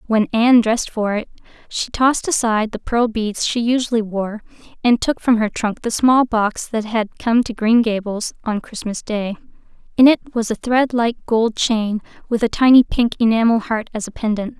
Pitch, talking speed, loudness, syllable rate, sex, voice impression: 225 Hz, 195 wpm, -18 LUFS, 4.9 syllables/s, female, very feminine, slightly young, thin, tensed, weak, bright, soft, very clear, very fluent, slightly raspy, very cute, very intellectual, refreshing, very sincere, calm, very friendly, very reassuring, very unique, very elegant, slightly wild, very sweet, lively, very kind, slightly intense, slightly modest, light